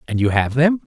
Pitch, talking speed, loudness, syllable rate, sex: 135 Hz, 255 wpm, -18 LUFS, 5.8 syllables/s, male